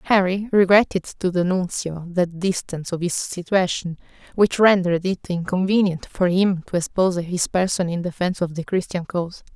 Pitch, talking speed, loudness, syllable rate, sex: 180 Hz, 165 wpm, -21 LUFS, 5.2 syllables/s, female